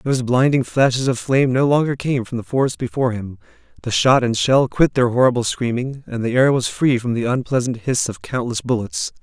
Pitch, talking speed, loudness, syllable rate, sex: 125 Hz, 215 wpm, -18 LUFS, 5.6 syllables/s, male